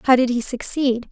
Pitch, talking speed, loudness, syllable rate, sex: 250 Hz, 215 wpm, -20 LUFS, 5.3 syllables/s, female